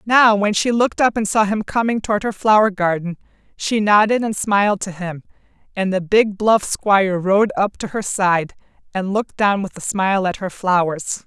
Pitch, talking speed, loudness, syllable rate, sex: 200 Hz, 200 wpm, -18 LUFS, 5.0 syllables/s, female